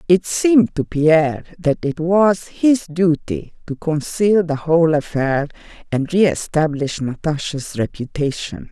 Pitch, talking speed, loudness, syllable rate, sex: 160 Hz, 125 wpm, -18 LUFS, 4.1 syllables/s, female